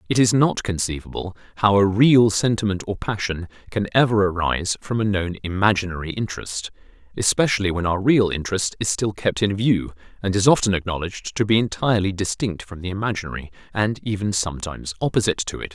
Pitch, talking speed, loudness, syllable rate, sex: 100 Hz, 170 wpm, -21 LUFS, 6.1 syllables/s, male